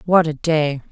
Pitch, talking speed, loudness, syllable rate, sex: 155 Hz, 200 wpm, -18 LUFS, 4.2 syllables/s, female